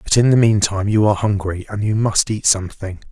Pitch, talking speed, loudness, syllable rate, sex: 105 Hz, 230 wpm, -17 LUFS, 6.0 syllables/s, male